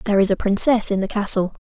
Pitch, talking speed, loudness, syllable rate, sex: 205 Hz, 260 wpm, -18 LUFS, 7.0 syllables/s, female